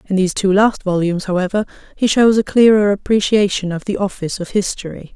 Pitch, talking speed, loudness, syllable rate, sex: 200 Hz, 185 wpm, -16 LUFS, 6.1 syllables/s, female